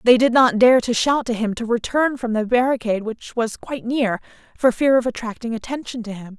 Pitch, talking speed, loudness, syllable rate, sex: 235 Hz, 225 wpm, -20 LUFS, 5.6 syllables/s, female